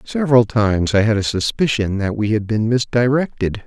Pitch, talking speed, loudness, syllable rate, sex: 115 Hz, 180 wpm, -17 LUFS, 5.3 syllables/s, male